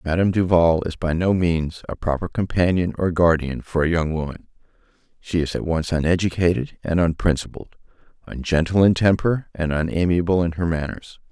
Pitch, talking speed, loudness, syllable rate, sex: 85 Hz, 160 wpm, -21 LUFS, 5.3 syllables/s, male